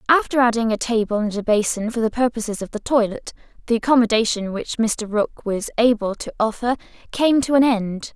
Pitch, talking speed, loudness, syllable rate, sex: 225 Hz, 190 wpm, -20 LUFS, 5.5 syllables/s, female